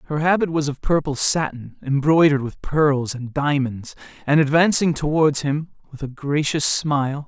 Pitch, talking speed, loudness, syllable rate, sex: 145 Hz, 155 wpm, -20 LUFS, 4.8 syllables/s, male